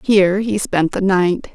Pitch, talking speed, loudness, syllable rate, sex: 190 Hz, 195 wpm, -16 LUFS, 4.3 syllables/s, female